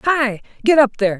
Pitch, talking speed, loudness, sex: 245 Hz, 200 wpm, -16 LUFS, female